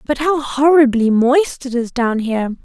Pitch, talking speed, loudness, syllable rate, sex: 260 Hz, 180 wpm, -15 LUFS, 4.6 syllables/s, female